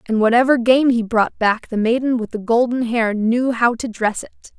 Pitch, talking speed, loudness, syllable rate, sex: 235 Hz, 225 wpm, -17 LUFS, 5.0 syllables/s, female